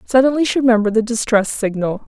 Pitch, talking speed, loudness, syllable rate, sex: 230 Hz, 165 wpm, -16 LUFS, 6.5 syllables/s, female